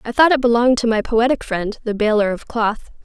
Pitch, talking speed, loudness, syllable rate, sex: 230 Hz, 235 wpm, -17 LUFS, 5.7 syllables/s, female